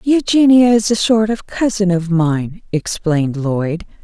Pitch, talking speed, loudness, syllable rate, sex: 195 Hz, 150 wpm, -15 LUFS, 4.1 syllables/s, female